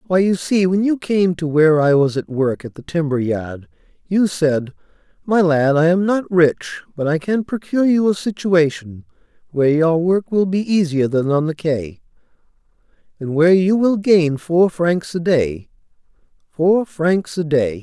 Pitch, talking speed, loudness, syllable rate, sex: 170 Hz, 180 wpm, -17 LUFS, 4.5 syllables/s, male